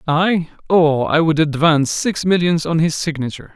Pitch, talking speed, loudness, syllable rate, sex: 160 Hz, 170 wpm, -17 LUFS, 5.0 syllables/s, male